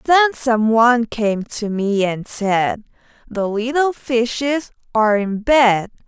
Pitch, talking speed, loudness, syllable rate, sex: 230 Hz, 140 wpm, -17 LUFS, 3.5 syllables/s, female